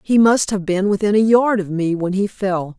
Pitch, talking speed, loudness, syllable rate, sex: 200 Hz, 260 wpm, -17 LUFS, 4.8 syllables/s, female